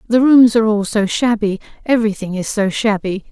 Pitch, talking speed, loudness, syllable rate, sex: 215 Hz, 165 wpm, -15 LUFS, 5.5 syllables/s, female